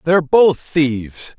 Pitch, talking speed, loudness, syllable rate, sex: 150 Hz, 130 wpm, -15 LUFS, 3.9 syllables/s, male